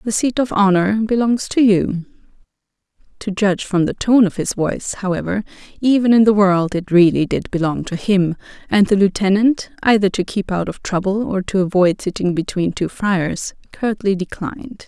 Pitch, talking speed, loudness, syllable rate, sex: 195 Hz, 175 wpm, -17 LUFS, 5.0 syllables/s, female